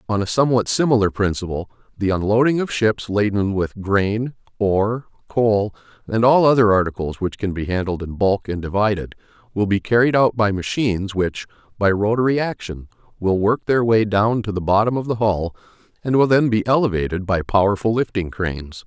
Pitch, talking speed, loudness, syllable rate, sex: 105 Hz, 180 wpm, -19 LUFS, 5.3 syllables/s, male